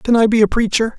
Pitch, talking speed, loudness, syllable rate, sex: 225 Hz, 305 wpm, -15 LUFS, 6.3 syllables/s, male